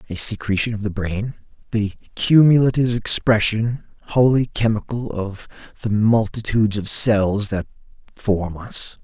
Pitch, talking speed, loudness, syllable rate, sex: 110 Hz, 120 wpm, -19 LUFS, 4.4 syllables/s, male